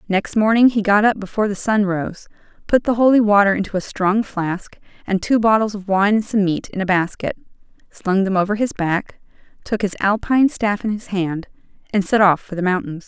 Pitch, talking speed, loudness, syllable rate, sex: 200 Hz, 210 wpm, -18 LUFS, 5.3 syllables/s, female